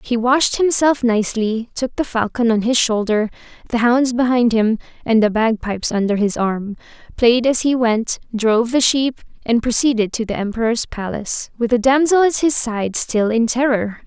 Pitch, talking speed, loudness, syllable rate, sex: 235 Hz, 180 wpm, -17 LUFS, 4.8 syllables/s, female